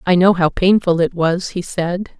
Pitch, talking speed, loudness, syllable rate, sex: 180 Hz, 220 wpm, -16 LUFS, 4.5 syllables/s, female